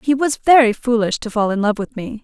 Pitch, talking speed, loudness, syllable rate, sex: 235 Hz, 270 wpm, -17 LUFS, 5.6 syllables/s, female